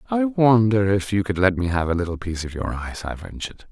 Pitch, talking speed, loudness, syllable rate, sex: 105 Hz, 260 wpm, -21 LUFS, 6.3 syllables/s, male